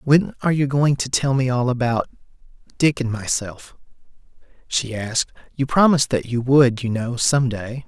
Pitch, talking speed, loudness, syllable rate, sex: 130 Hz, 170 wpm, -20 LUFS, 4.9 syllables/s, male